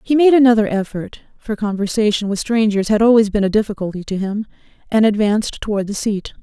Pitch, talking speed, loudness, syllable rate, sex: 210 Hz, 170 wpm, -17 LUFS, 6.0 syllables/s, female